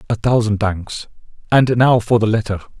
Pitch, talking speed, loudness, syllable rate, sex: 110 Hz, 150 wpm, -16 LUFS, 5.0 syllables/s, male